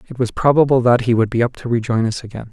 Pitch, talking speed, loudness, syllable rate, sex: 120 Hz, 285 wpm, -17 LUFS, 6.8 syllables/s, male